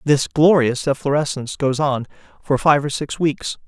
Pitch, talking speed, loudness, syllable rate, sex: 140 Hz, 165 wpm, -19 LUFS, 4.9 syllables/s, male